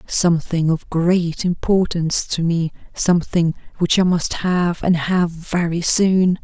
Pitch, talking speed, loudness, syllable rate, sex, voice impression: 170 Hz, 140 wpm, -18 LUFS, 4.0 syllables/s, female, feminine, adult-like, slightly relaxed, slightly weak, soft, slightly raspy, intellectual, calm, reassuring, elegant, slightly kind, modest